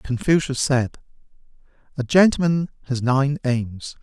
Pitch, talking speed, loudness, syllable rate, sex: 135 Hz, 105 wpm, -21 LUFS, 4.1 syllables/s, male